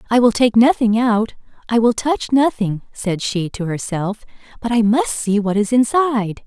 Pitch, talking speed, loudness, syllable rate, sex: 225 Hz, 185 wpm, -17 LUFS, 4.6 syllables/s, female